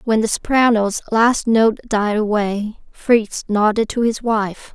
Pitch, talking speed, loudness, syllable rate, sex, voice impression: 220 Hz, 150 wpm, -17 LUFS, 3.7 syllables/s, female, slightly feminine, slightly gender-neutral, slightly young, slightly adult-like, slightly bright, soft, slightly halting, unique, kind, slightly modest